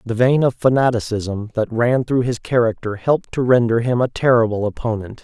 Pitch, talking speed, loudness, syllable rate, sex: 120 Hz, 185 wpm, -18 LUFS, 5.3 syllables/s, male